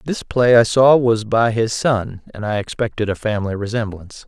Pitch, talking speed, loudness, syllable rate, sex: 110 Hz, 195 wpm, -17 LUFS, 5.2 syllables/s, male